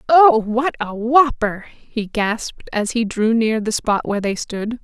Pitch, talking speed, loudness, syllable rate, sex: 230 Hz, 185 wpm, -18 LUFS, 4.0 syllables/s, female